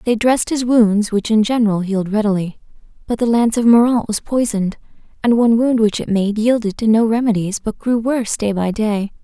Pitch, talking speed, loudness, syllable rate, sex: 220 Hz, 210 wpm, -16 LUFS, 5.8 syllables/s, female